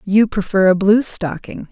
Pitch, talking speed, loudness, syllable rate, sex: 200 Hz, 140 wpm, -15 LUFS, 4.4 syllables/s, female